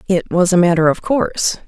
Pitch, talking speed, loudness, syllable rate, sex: 180 Hz, 215 wpm, -15 LUFS, 5.6 syllables/s, female